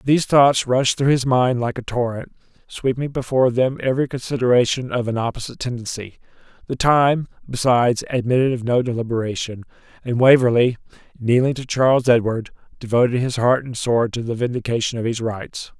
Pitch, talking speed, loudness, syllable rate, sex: 125 Hz, 150 wpm, -19 LUFS, 5.7 syllables/s, male